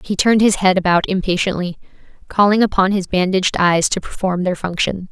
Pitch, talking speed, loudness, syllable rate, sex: 190 Hz, 175 wpm, -16 LUFS, 5.8 syllables/s, female